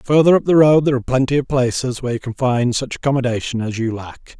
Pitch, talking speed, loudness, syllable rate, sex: 130 Hz, 245 wpm, -17 LUFS, 6.5 syllables/s, male